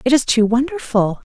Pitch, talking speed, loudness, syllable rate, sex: 230 Hz, 185 wpm, -17 LUFS, 5.2 syllables/s, female